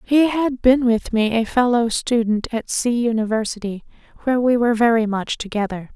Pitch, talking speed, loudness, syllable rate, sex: 230 Hz, 170 wpm, -19 LUFS, 5.2 syllables/s, female